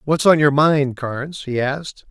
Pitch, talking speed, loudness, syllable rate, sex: 145 Hz, 200 wpm, -18 LUFS, 4.6 syllables/s, male